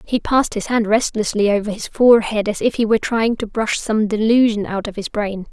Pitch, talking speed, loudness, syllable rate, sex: 215 Hz, 230 wpm, -18 LUFS, 5.6 syllables/s, female